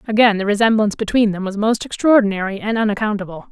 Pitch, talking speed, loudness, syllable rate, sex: 210 Hz, 170 wpm, -17 LUFS, 6.9 syllables/s, female